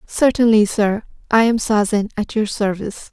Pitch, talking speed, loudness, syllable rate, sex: 215 Hz, 155 wpm, -17 LUFS, 4.9 syllables/s, female